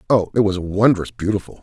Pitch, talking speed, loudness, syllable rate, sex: 100 Hz, 185 wpm, -19 LUFS, 5.8 syllables/s, male